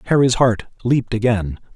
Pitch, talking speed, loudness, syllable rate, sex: 115 Hz, 135 wpm, -18 LUFS, 5.6 syllables/s, male